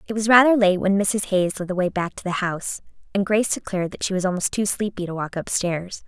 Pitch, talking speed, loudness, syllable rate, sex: 190 Hz, 265 wpm, -22 LUFS, 6.1 syllables/s, female